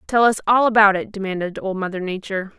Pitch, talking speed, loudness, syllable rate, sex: 200 Hz, 210 wpm, -19 LUFS, 6.4 syllables/s, female